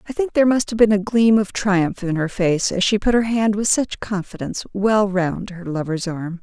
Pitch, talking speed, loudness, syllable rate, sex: 200 Hz, 245 wpm, -19 LUFS, 5.0 syllables/s, female